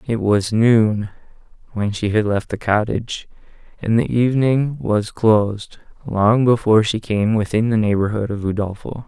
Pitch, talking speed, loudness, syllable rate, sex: 110 Hz, 150 wpm, -18 LUFS, 4.6 syllables/s, male